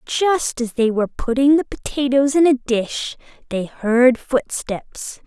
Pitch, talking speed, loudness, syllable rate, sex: 255 Hz, 150 wpm, -19 LUFS, 3.8 syllables/s, female